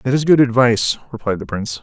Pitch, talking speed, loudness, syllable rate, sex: 125 Hz, 230 wpm, -16 LUFS, 6.6 syllables/s, male